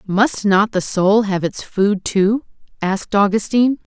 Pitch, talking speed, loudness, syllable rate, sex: 205 Hz, 150 wpm, -17 LUFS, 4.2 syllables/s, female